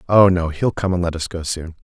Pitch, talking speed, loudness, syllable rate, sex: 90 Hz, 290 wpm, -19 LUFS, 5.6 syllables/s, male